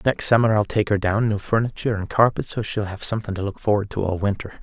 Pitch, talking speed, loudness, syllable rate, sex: 105 Hz, 260 wpm, -22 LUFS, 6.6 syllables/s, male